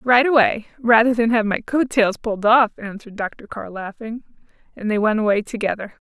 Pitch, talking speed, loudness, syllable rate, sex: 220 Hz, 180 wpm, -19 LUFS, 5.3 syllables/s, female